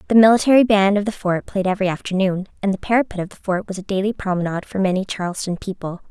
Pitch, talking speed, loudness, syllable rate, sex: 195 Hz, 225 wpm, -19 LUFS, 7.1 syllables/s, female